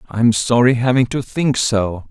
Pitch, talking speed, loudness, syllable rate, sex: 115 Hz, 170 wpm, -16 LUFS, 4.2 syllables/s, male